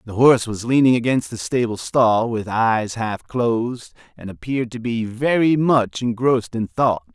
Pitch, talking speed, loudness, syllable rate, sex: 115 Hz, 175 wpm, -19 LUFS, 4.6 syllables/s, male